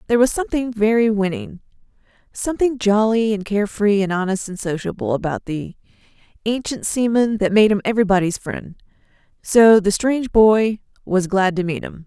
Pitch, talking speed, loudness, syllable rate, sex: 210 Hz, 150 wpm, -18 LUFS, 5.3 syllables/s, female